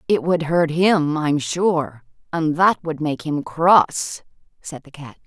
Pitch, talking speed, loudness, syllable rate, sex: 155 Hz, 170 wpm, -19 LUFS, 3.6 syllables/s, female